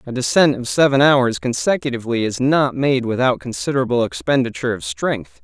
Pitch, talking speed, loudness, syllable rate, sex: 125 Hz, 155 wpm, -18 LUFS, 5.7 syllables/s, male